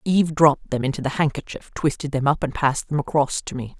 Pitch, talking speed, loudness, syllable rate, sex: 145 Hz, 235 wpm, -22 LUFS, 6.3 syllables/s, female